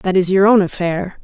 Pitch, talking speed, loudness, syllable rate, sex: 185 Hz, 245 wpm, -15 LUFS, 5.0 syllables/s, female